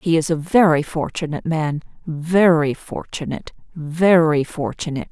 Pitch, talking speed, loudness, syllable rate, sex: 160 Hz, 95 wpm, -19 LUFS, 4.9 syllables/s, female